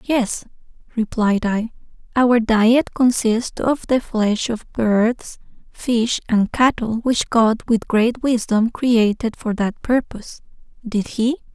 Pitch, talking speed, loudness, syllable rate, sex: 230 Hz, 130 wpm, -19 LUFS, 3.4 syllables/s, female